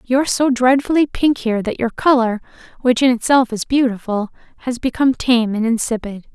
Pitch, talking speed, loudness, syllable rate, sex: 245 Hz, 170 wpm, -17 LUFS, 5.6 syllables/s, female